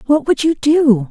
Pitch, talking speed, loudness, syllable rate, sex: 280 Hz, 220 wpm, -14 LUFS, 4.2 syllables/s, female